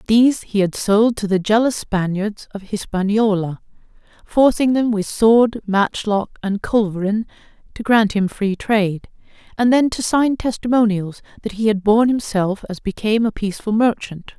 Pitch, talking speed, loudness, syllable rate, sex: 215 Hz, 155 wpm, -18 LUFS, 4.7 syllables/s, female